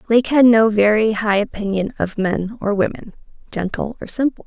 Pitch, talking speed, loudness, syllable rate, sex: 215 Hz, 175 wpm, -18 LUFS, 5.0 syllables/s, female